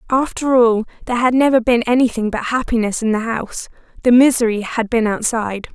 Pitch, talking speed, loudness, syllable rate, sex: 235 Hz, 165 wpm, -16 LUFS, 5.9 syllables/s, female